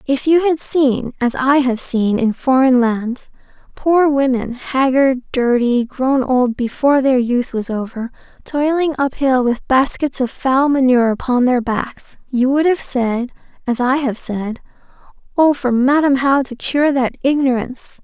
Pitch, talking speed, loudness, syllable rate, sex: 260 Hz, 165 wpm, -16 LUFS, 4.2 syllables/s, female